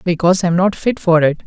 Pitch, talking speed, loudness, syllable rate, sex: 175 Hz, 285 wpm, -15 LUFS, 6.7 syllables/s, male